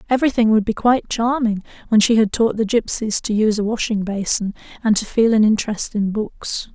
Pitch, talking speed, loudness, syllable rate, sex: 220 Hz, 205 wpm, -18 LUFS, 5.7 syllables/s, female